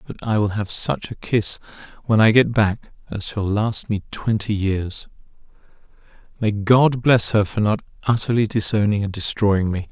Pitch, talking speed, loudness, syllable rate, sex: 105 Hz, 170 wpm, -20 LUFS, 4.5 syllables/s, male